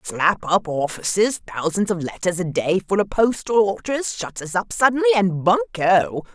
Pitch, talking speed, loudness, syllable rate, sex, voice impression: 190 Hz, 150 wpm, -20 LUFS, 4.5 syllables/s, female, feminine, adult-like, slightly clear, fluent, slightly intellectual, slightly strict, slightly sharp